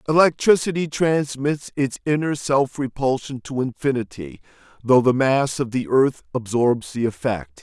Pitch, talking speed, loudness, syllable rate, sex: 135 Hz, 135 wpm, -21 LUFS, 4.5 syllables/s, male